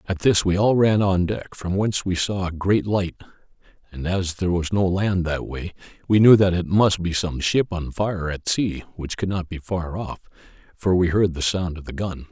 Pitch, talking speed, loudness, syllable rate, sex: 90 Hz, 235 wpm, -22 LUFS, 4.8 syllables/s, male